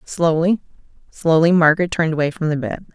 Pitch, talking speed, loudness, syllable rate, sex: 165 Hz, 165 wpm, -18 LUFS, 6.1 syllables/s, female